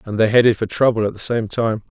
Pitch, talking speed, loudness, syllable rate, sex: 110 Hz, 275 wpm, -18 LUFS, 6.8 syllables/s, male